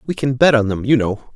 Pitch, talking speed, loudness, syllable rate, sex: 125 Hz, 310 wpm, -16 LUFS, 6.1 syllables/s, male